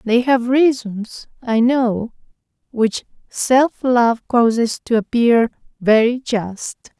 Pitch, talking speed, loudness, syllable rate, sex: 235 Hz, 110 wpm, -17 LUFS, 3.1 syllables/s, female